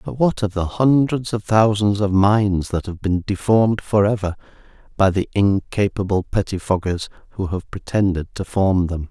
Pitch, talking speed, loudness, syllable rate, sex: 100 Hz, 165 wpm, -19 LUFS, 4.7 syllables/s, male